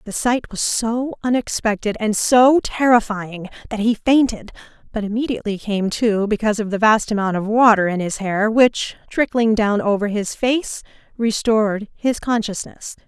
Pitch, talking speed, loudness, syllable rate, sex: 220 Hz, 155 wpm, -18 LUFS, 4.7 syllables/s, female